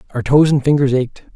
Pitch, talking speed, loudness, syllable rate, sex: 135 Hz, 220 wpm, -14 LUFS, 5.9 syllables/s, male